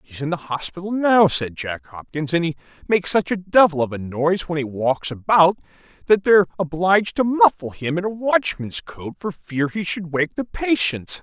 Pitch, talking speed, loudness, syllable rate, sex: 170 Hz, 205 wpm, -20 LUFS, 5.0 syllables/s, male